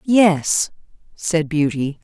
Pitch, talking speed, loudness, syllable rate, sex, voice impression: 165 Hz, 90 wpm, -19 LUFS, 2.7 syllables/s, female, feminine, slightly gender-neutral, very adult-like, very middle-aged, thin, slightly tensed, slightly weak, bright, very soft, clear, fluent, slightly cute, cool, intellectual, refreshing, very sincere, very calm, friendly, very reassuring, slightly unique, very elegant, sweet, slightly lively, very kind, very modest